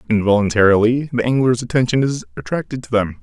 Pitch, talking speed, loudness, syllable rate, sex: 115 Hz, 150 wpm, -17 LUFS, 6.2 syllables/s, male